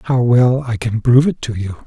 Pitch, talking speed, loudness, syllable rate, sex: 120 Hz, 255 wpm, -15 LUFS, 4.9 syllables/s, male